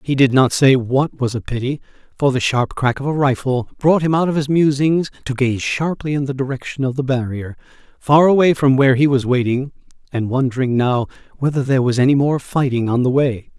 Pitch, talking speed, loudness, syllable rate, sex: 135 Hz, 215 wpm, -17 LUFS, 5.6 syllables/s, male